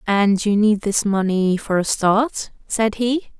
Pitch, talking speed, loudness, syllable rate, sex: 210 Hz, 175 wpm, -19 LUFS, 3.6 syllables/s, female